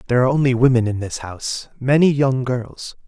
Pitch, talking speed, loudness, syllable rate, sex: 125 Hz, 175 wpm, -18 LUFS, 6.0 syllables/s, male